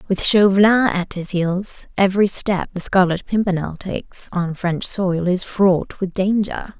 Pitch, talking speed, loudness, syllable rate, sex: 190 Hz, 160 wpm, -19 LUFS, 4.2 syllables/s, female